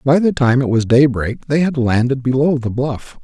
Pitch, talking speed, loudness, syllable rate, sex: 130 Hz, 220 wpm, -16 LUFS, 5.0 syllables/s, male